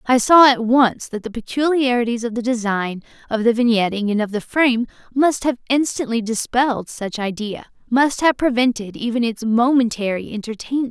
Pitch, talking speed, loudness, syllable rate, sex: 235 Hz, 160 wpm, -19 LUFS, 5.2 syllables/s, female